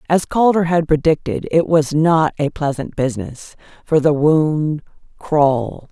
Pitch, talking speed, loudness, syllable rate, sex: 155 Hz, 140 wpm, -17 LUFS, 4.2 syllables/s, female